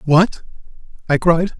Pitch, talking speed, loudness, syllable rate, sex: 170 Hz, 115 wpm, -16 LUFS, 4.0 syllables/s, male